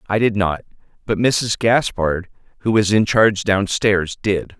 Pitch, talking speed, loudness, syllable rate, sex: 105 Hz, 155 wpm, -18 LUFS, 4.2 syllables/s, male